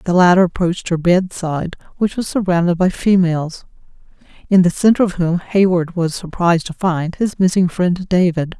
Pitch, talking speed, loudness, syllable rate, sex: 180 Hz, 165 wpm, -16 LUFS, 5.3 syllables/s, female